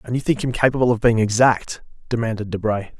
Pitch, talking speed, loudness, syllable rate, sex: 120 Hz, 200 wpm, -19 LUFS, 6.1 syllables/s, male